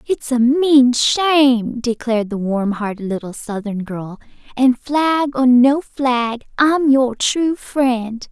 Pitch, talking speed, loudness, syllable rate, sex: 250 Hz, 145 wpm, -16 LUFS, 3.4 syllables/s, female